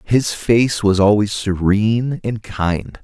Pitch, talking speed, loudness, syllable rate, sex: 105 Hz, 140 wpm, -17 LUFS, 3.5 syllables/s, male